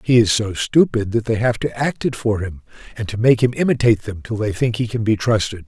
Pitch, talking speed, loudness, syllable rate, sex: 115 Hz, 265 wpm, -18 LUFS, 5.8 syllables/s, male